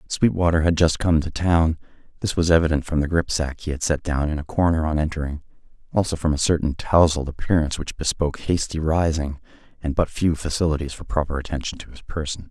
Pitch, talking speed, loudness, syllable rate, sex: 80 Hz, 190 wpm, -22 LUFS, 6.0 syllables/s, male